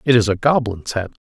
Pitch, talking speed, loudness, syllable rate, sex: 115 Hz, 235 wpm, -19 LUFS, 5.6 syllables/s, male